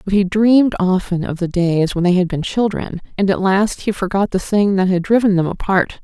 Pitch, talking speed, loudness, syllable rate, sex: 190 Hz, 240 wpm, -16 LUFS, 5.2 syllables/s, female